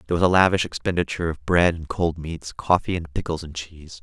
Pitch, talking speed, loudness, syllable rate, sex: 85 Hz, 225 wpm, -23 LUFS, 6.3 syllables/s, male